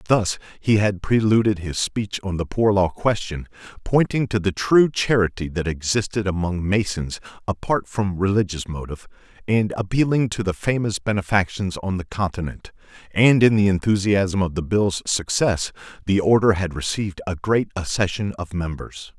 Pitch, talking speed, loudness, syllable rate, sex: 100 Hz, 155 wpm, -21 LUFS, 4.9 syllables/s, male